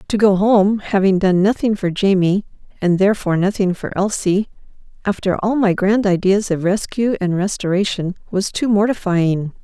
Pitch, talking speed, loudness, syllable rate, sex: 195 Hz, 155 wpm, -17 LUFS, 5.0 syllables/s, female